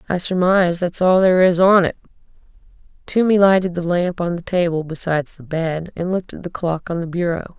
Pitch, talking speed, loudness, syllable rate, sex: 175 Hz, 205 wpm, -18 LUFS, 5.7 syllables/s, female